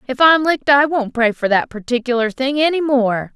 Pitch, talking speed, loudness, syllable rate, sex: 260 Hz, 215 wpm, -16 LUFS, 5.3 syllables/s, female